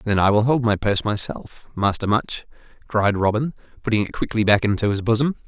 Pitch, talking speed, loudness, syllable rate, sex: 110 Hz, 195 wpm, -21 LUFS, 5.8 syllables/s, male